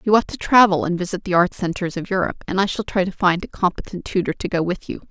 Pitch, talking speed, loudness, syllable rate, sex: 185 Hz, 280 wpm, -20 LUFS, 6.7 syllables/s, female